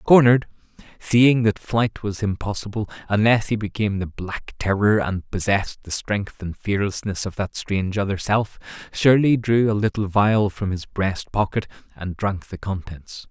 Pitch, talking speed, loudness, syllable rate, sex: 100 Hz, 160 wpm, -21 LUFS, 4.6 syllables/s, male